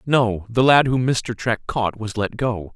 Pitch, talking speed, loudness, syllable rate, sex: 115 Hz, 220 wpm, -20 LUFS, 3.9 syllables/s, male